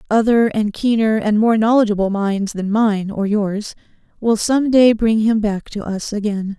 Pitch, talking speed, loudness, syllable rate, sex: 215 Hz, 180 wpm, -17 LUFS, 4.4 syllables/s, female